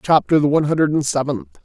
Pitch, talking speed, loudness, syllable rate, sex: 150 Hz, 220 wpm, -17 LUFS, 7.1 syllables/s, male